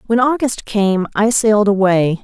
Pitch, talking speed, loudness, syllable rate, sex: 210 Hz, 160 wpm, -15 LUFS, 4.5 syllables/s, female